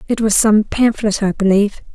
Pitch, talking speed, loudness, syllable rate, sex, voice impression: 210 Hz, 185 wpm, -15 LUFS, 5.4 syllables/s, female, feminine, slightly adult-like, slightly raspy, slightly cute, calm, kind, slightly light